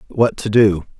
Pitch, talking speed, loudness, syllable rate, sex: 100 Hz, 180 wpm, -16 LUFS, 4.2 syllables/s, male